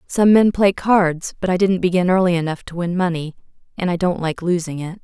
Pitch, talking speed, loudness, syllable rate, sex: 180 Hz, 225 wpm, -18 LUFS, 5.5 syllables/s, female